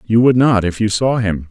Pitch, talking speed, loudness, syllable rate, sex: 110 Hz, 280 wpm, -14 LUFS, 5.0 syllables/s, male